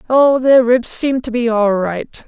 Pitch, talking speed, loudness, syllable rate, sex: 245 Hz, 210 wpm, -14 LUFS, 3.8 syllables/s, female